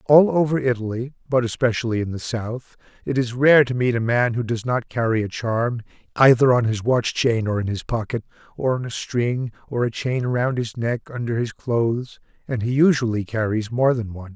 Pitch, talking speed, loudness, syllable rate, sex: 120 Hz, 210 wpm, -21 LUFS, 5.1 syllables/s, male